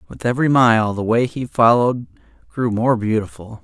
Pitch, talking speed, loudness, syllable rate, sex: 115 Hz, 165 wpm, -17 LUFS, 5.3 syllables/s, male